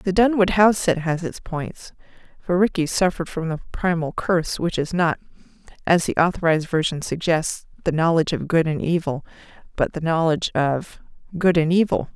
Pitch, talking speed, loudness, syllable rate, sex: 170 Hz, 165 wpm, -21 LUFS, 5.4 syllables/s, female